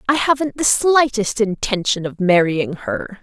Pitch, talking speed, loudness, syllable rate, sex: 220 Hz, 150 wpm, -17 LUFS, 4.3 syllables/s, female